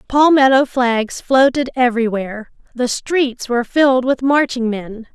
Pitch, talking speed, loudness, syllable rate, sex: 250 Hz, 130 wpm, -16 LUFS, 4.5 syllables/s, female